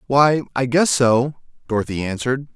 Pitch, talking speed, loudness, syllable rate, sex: 130 Hz, 140 wpm, -19 LUFS, 5.1 syllables/s, male